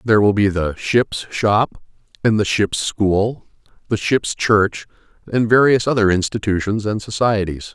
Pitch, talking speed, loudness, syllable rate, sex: 105 Hz, 145 wpm, -18 LUFS, 4.3 syllables/s, male